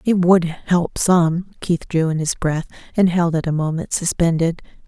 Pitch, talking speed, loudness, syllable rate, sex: 170 Hz, 170 wpm, -19 LUFS, 4.3 syllables/s, female